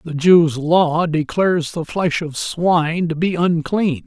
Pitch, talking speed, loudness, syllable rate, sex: 165 Hz, 160 wpm, -17 LUFS, 3.8 syllables/s, male